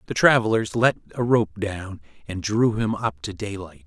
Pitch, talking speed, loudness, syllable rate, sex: 105 Hz, 185 wpm, -22 LUFS, 4.6 syllables/s, male